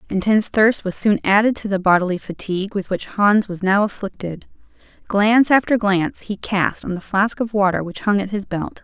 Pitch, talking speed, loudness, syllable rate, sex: 200 Hz, 205 wpm, -19 LUFS, 5.4 syllables/s, female